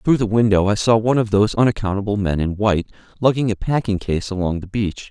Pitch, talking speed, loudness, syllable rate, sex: 105 Hz, 225 wpm, -19 LUFS, 6.3 syllables/s, male